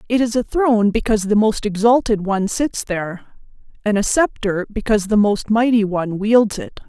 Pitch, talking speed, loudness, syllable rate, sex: 215 Hz, 175 wpm, -18 LUFS, 5.4 syllables/s, female